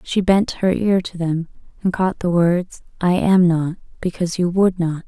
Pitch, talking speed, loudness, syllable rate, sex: 180 Hz, 200 wpm, -19 LUFS, 4.5 syllables/s, female